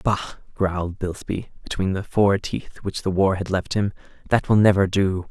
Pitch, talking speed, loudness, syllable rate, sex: 95 Hz, 190 wpm, -22 LUFS, 5.0 syllables/s, male